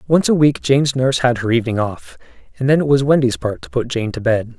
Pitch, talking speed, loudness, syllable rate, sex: 125 Hz, 260 wpm, -17 LUFS, 6.2 syllables/s, male